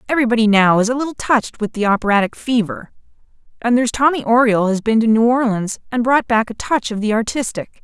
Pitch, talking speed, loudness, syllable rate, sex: 230 Hz, 205 wpm, -16 LUFS, 6.5 syllables/s, female